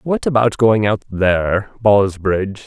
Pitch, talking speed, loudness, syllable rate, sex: 105 Hz, 135 wpm, -16 LUFS, 4.3 syllables/s, male